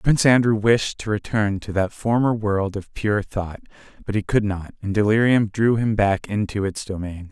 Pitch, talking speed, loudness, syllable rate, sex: 105 Hz, 195 wpm, -21 LUFS, 4.8 syllables/s, male